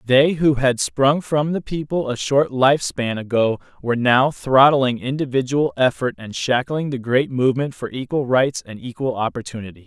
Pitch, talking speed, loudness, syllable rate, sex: 130 Hz, 170 wpm, -19 LUFS, 4.8 syllables/s, male